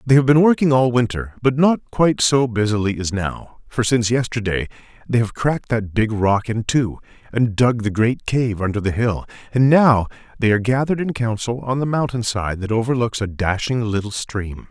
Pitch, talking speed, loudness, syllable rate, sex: 115 Hz, 200 wpm, -19 LUFS, 5.2 syllables/s, male